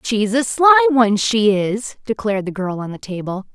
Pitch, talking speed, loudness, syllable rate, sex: 225 Hz, 205 wpm, -17 LUFS, 4.9 syllables/s, female